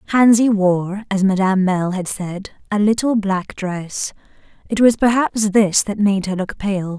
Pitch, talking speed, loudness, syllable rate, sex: 200 Hz, 170 wpm, -17 LUFS, 4.4 syllables/s, female